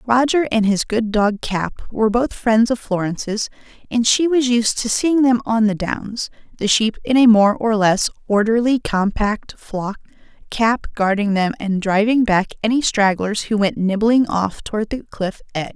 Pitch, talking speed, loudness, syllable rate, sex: 220 Hz, 180 wpm, -18 LUFS, 4.6 syllables/s, female